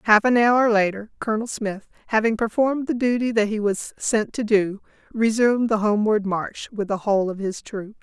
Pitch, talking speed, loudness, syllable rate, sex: 215 Hz, 195 wpm, -22 LUFS, 5.3 syllables/s, female